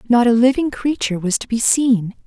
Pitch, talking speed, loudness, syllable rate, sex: 235 Hz, 210 wpm, -17 LUFS, 5.5 syllables/s, female